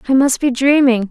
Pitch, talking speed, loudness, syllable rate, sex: 260 Hz, 215 wpm, -14 LUFS, 5.4 syllables/s, female